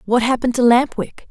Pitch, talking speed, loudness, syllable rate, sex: 240 Hz, 230 wpm, -16 LUFS, 6.0 syllables/s, female